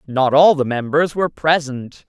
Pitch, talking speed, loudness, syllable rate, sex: 145 Hz, 175 wpm, -16 LUFS, 4.7 syllables/s, male